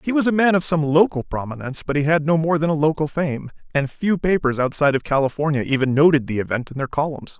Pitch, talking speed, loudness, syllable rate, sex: 150 Hz, 245 wpm, -20 LUFS, 6.4 syllables/s, male